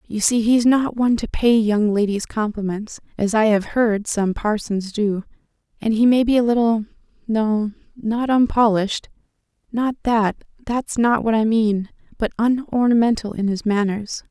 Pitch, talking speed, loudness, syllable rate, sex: 220 Hz, 145 wpm, -19 LUFS, 4.6 syllables/s, female